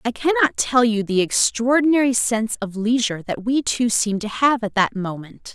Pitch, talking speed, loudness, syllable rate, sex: 225 Hz, 195 wpm, -19 LUFS, 5.2 syllables/s, female